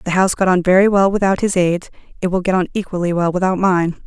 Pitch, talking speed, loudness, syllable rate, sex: 185 Hz, 250 wpm, -16 LUFS, 6.5 syllables/s, female